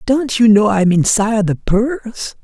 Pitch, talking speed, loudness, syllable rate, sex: 220 Hz, 170 wpm, -14 LUFS, 4.4 syllables/s, male